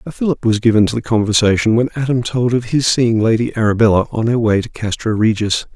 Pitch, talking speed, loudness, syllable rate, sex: 115 Hz, 220 wpm, -15 LUFS, 6.0 syllables/s, male